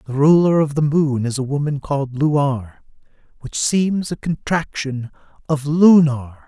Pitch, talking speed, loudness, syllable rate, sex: 145 Hz, 150 wpm, -18 LUFS, 4.3 syllables/s, male